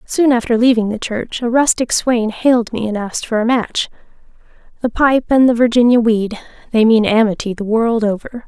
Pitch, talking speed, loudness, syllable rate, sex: 230 Hz, 185 wpm, -15 LUFS, 5.2 syllables/s, female